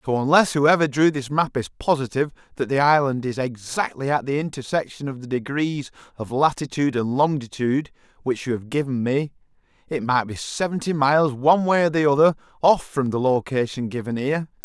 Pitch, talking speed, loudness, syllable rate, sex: 140 Hz, 180 wpm, -22 LUFS, 5.7 syllables/s, male